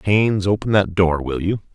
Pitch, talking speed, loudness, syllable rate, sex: 95 Hz, 205 wpm, -19 LUFS, 5.0 syllables/s, male